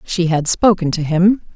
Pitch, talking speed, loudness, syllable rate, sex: 175 Hz, 195 wpm, -15 LUFS, 4.4 syllables/s, female